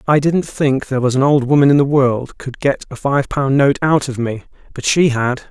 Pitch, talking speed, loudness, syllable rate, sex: 135 Hz, 250 wpm, -15 LUFS, 5.1 syllables/s, male